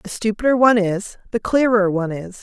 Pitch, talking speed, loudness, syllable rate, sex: 210 Hz, 200 wpm, -18 LUFS, 5.8 syllables/s, female